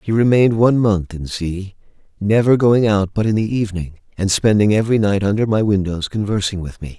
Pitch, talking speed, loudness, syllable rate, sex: 105 Hz, 200 wpm, -17 LUFS, 5.8 syllables/s, male